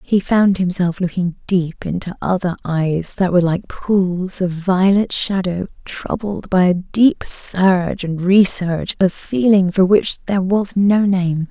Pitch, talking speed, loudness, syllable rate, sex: 185 Hz, 155 wpm, -17 LUFS, 3.9 syllables/s, female